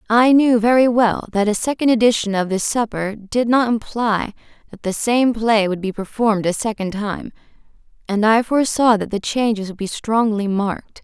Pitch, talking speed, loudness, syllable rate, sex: 220 Hz, 185 wpm, -18 LUFS, 5.0 syllables/s, female